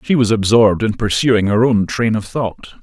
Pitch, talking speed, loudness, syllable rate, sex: 110 Hz, 210 wpm, -15 LUFS, 4.8 syllables/s, male